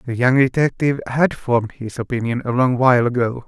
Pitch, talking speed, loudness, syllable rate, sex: 125 Hz, 190 wpm, -18 LUFS, 5.9 syllables/s, male